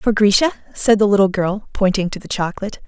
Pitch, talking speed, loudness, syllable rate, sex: 200 Hz, 210 wpm, -17 LUFS, 6.3 syllables/s, female